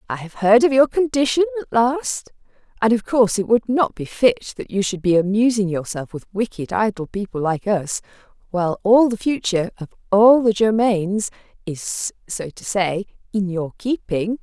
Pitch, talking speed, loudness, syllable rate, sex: 215 Hz, 180 wpm, -19 LUFS, 4.8 syllables/s, female